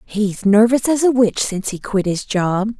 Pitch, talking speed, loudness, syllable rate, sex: 215 Hz, 215 wpm, -17 LUFS, 4.5 syllables/s, female